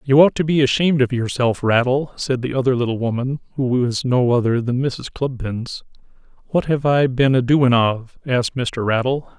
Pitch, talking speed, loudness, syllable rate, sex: 130 Hz, 190 wpm, -19 LUFS, 5.0 syllables/s, male